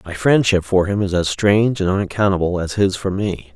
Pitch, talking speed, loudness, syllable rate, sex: 95 Hz, 220 wpm, -18 LUFS, 5.5 syllables/s, male